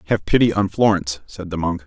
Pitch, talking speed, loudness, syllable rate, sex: 95 Hz, 225 wpm, -19 LUFS, 6.1 syllables/s, male